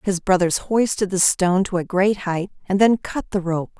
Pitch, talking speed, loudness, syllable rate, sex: 190 Hz, 220 wpm, -20 LUFS, 5.0 syllables/s, female